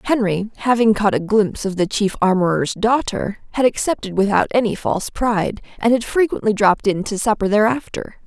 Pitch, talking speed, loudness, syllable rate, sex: 210 Hz, 175 wpm, -18 LUFS, 5.6 syllables/s, female